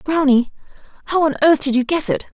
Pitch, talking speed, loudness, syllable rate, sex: 285 Hz, 200 wpm, -17 LUFS, 5.7 syllables/s, female